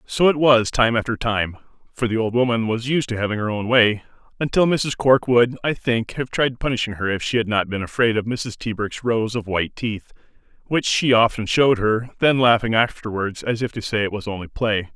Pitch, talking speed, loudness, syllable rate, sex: 115 Hz, 225 wpm, -20 LUFS, 4.7 syllables/s, male